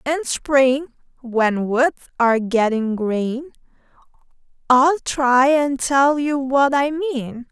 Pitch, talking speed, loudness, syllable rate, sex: 265 Hz, 120 wpm, -18 LUFS, 3.0 syllables/s, female